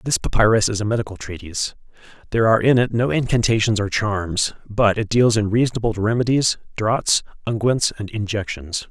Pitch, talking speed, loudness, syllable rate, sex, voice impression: 110 Hz, 160 wpm, -20 LUFS, 5.6 syllables/s, male, very masculine, very adult-like, slightly thick, slightly fluent, cool, slightly intellectual, slightly calm